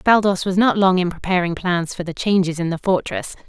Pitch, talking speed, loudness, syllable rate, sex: 185 Hz, 225 wpm, -19 LUFS, 5.5 syllables/s, female